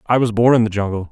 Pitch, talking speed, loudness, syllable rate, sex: 110 Hz, 320 wpm, -16 LUFS, 7.1 syllables/s, male